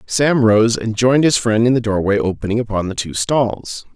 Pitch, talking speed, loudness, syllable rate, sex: 115 Hz, 210 wpm, -16 LUFS, 5.0 syllables/s, male